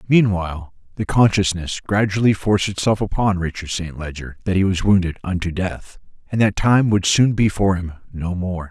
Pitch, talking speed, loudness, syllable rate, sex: 95 Hz, 180 wpm, -19 LUFS, 5.1 syllables/s, male